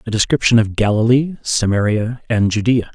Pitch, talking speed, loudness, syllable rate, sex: 115 Hz, 140 wpm, -16 LUFS, 5.2 syllables/s, male